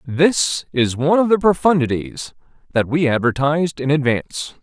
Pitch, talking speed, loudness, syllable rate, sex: 150 Hz, 145 wpm, -18 LUFS, 5.0 syllables/s, male